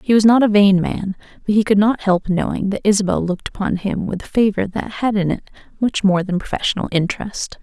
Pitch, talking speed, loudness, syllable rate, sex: 200 Hz, 230 wpm, -18 LUFS, 5.8 syllables/s, female